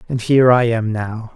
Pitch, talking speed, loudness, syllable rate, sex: 115 Hz, 220 wpm, -15 LUFS, 5.1 syllables/s, male